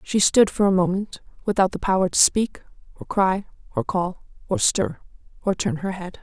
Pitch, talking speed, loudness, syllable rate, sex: 190 Hz, 195 wpm, -22 LUFS, 4.9 syllables/s, female